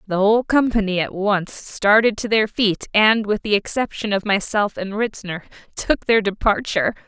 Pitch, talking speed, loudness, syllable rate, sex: 205 Hz, 170 wpm, -19 LUFS, 4.9 syllables/s, female